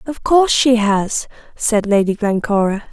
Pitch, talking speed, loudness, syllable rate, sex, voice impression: 220 Hz, 145 wpm, -16 LUFS, 4.4 syllables/s, female, very feminine, very young, very thin, slightly tensed, slightly weak, bright, soft, clear, fluent, slightly raspy, very cute, intellectual, very refreshing, sincere, very calm, friendly, very reassuring, very unique, elegant, slightly wild, very sweet, slightly lively, kind, slightly sharp, slightly modest, light